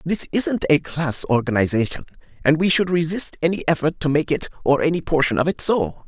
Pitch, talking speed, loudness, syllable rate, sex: 155 Hz, 200 wpm, -20 LUFS, 5.6 syllables/s, male